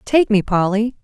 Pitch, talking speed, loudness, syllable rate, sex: 215 Hz, 175 wpm, -17 LUFS, 4.6 syllables/s, female